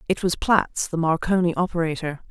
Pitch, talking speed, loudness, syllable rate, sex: 170 Hz, 155 wpm, -22 LUFS, 5.3 syllables/s, female